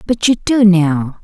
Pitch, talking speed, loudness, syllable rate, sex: 195 Hz, 195 wpm, -13 LUFS, 3.7 syllables/s, female